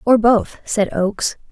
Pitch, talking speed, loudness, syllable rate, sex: 215 Hz, 160 wpm, -18 LUFS, 3.9 syllables/s, female